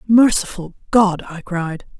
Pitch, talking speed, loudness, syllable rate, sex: 190 Hz, 120 wpm, -17 LUFS, 3.8 syllables/s, female